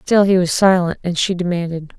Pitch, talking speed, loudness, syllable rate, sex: 180 Hz, 210 wpm, -16 LUFS, 5.4 syllables/s, female